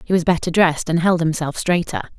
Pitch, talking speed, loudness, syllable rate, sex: 170 Hz, 220 wpm, -18 LUFS, 5.9 syllables/s, female